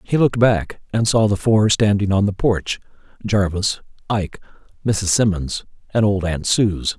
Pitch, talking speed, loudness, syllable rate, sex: 100 Hz, 165 wpm, -19 LUFS, 4.5 syllables/s, male